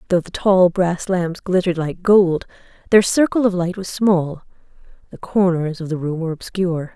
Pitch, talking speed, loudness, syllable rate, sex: 180 Hz, 180 wpm, -18 LUFS, 5.0 syllables/s, female